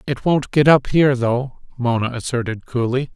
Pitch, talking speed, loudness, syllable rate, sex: 130 Hz, 170 wpm, -18 LUFS, 4.9 syllables/s, male